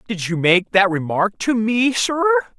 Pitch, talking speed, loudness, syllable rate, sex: 220 Hz, 185 wpm, -18 LUFS, 4.3 syllables/s, male